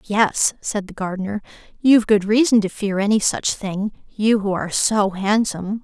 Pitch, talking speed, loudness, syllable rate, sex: 205 Hz, 175 wpm, -19 LUFS, 4.9 syllables/s, female